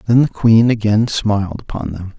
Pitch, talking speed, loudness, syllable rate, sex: 105 Hz, 190 wpm, -15 LUFS, 5.1 syllables/s, male